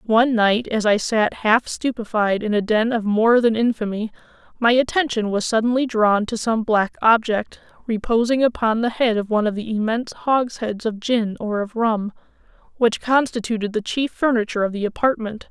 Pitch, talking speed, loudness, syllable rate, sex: 225 Hz, 180 wpm, -20 LUFS, 5.1 syllables/s, female